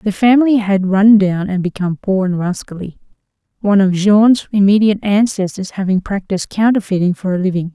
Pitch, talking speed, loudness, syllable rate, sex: 195 Hz, 165 wpm, -14 LUFS, 5.8 syllables/s, female